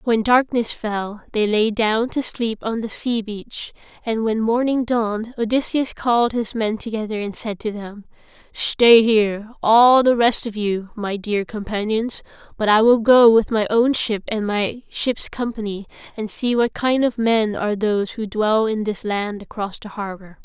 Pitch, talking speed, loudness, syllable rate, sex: 220 Hz, 185 wpm, -20 LUFS, 4.3 syllables/s, female